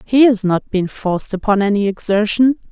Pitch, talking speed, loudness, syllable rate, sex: 215 Hz, 175 wpm, -16 LUFS, 5.2 syllables/s, female